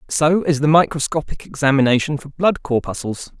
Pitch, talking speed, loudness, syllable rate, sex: 145 Hz, 140 wpm, -18 LUFS, 5.4 syllables/s, male